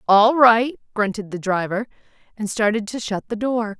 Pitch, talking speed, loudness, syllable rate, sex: 220 Hz, 175 wpm, -20 LUFS, 4.9 syllables/s, female